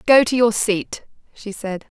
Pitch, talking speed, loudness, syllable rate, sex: 220 Hz, 180 wpm, -19 LUFS, 4.1 syllables/s, female